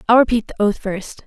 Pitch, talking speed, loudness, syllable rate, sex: 220 Hz, 240 wpm, -18 LUFS, 5.7 syllables/s, female